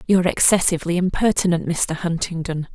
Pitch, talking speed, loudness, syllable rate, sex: 175 Hz, 110 wpm, -20 LUFS, 5.9 syllables/s, female